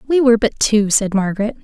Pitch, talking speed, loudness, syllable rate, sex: 220 Hz, 220 wpm, -15 LUFS, 6.3 syllables/s, female